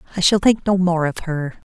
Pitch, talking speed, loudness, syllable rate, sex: 175 Hz, 245 wpm, -18 LUFS, 5.4 syllables/s, female